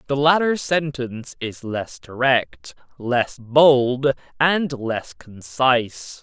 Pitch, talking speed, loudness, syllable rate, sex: 130 Hz, 105 wpm, -20 LUFS, 3.1 syllables/s, male